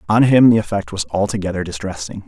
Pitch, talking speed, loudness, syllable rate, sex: 100 Hz, 185 wpm, -17 LUFS, 6.2 syllables/s, male